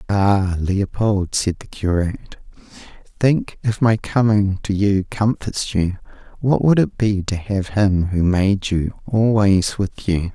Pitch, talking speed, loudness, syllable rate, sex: 100 Hz, 150 wpm, -19 LUFS, 3.7 syllables/s, male